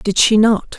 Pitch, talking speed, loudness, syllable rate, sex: 210 Hz, 230 wpm, -13 LUFS, 4.0 syllables/s, female